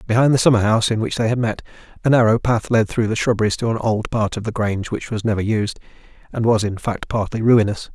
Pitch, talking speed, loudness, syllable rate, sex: 110 Hz, 250 wpm, -19 LUFS, 6.3 syllables/s, male